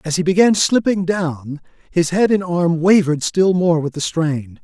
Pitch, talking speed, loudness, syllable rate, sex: 170 Hz, 195 wpm, -16 LUFS, 4.5 syllables/s, male